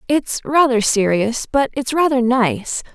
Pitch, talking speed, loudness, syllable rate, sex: 245 Hz, 140 wpm, -17 LUFS, 3.9 syllables/s, female